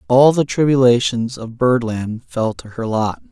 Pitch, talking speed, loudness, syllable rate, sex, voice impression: 120 Hz, 165 wpm, -17 LUFS, 4.3 syllables/s, male, masculine, adult-like, slightly cool, calm, slightly friendly, slightly kind